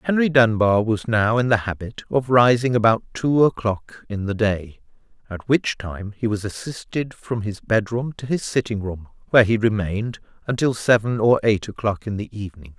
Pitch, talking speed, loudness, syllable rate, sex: 110 Hz, 185 wpm, -21 LUFS, 5.0 syllables/s, male